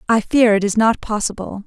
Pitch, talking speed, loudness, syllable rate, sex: 215 Hz, 215 wpm, -17 LUFS, 5.4 syllables/s, female